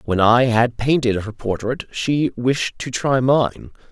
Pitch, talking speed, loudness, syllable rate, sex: 120 Hz, 170 wpm, -19 LUFS, 3.8 syllables/s, male